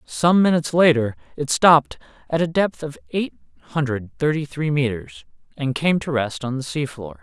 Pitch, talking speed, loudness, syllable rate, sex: 140 Hz, 175 wpm, -20 LUFS, 5.0 syllables/s, male